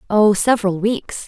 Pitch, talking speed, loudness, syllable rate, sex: 210 Hz, 140 wpm, -17 LUFS, 4.7 syllables/s, female